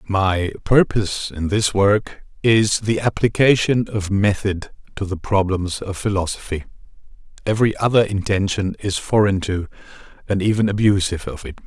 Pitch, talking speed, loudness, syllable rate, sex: 100 Hz, 135 wpm, -19 LUFS, 4.9 syllables/s, male